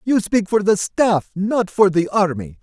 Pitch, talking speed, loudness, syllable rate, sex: 195 Hz, 185 wpm, -18 LUFS, 4.0 syllables/s, male